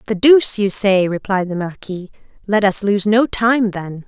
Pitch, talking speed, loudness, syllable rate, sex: 200 Hz, 190 wpm, -16 LUFS, 4.5 syllables/s, female